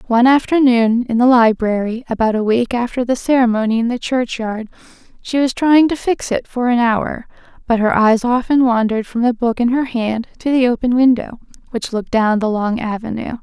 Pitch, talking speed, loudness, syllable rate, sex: 235 Hz, 195 wpm, -16 LUFS, 5.3 syllables/s, female